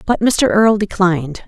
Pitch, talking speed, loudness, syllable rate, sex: 200 Hz, 165 wpm, -14 LUFS, 5.3 syllables/s, female